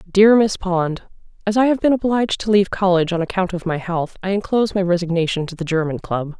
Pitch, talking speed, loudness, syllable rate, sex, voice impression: 185 Hz, 225 wpm, -19 LUFS, 6.2 syllables/s, female, gender-neutral, adult-like, slightly sincere, calm, friendly, reassuring, slightly kind